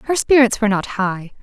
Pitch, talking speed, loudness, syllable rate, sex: 220 Hz, 210 wpm, -16 LUFS, 5.4 syllables/s, female